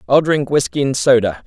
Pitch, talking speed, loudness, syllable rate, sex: 130 Hz, 205 wpm, -15 LUFS, 5.4 syllables/s, male